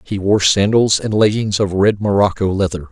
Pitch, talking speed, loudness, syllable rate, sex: 100 Hz, 185 wpm, -15 LUFS, 5.0 syllables/s, male